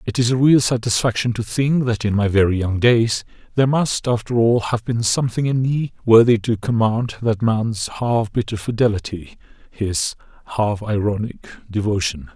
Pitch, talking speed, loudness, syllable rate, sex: 110 Hz, 165 wpm, -19 LUFS, 4.9 syllables/s, male